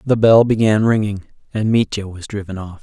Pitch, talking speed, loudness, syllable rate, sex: 105 Hz, 190 wpm, -16 LUFS, 5.2 syllables/s, male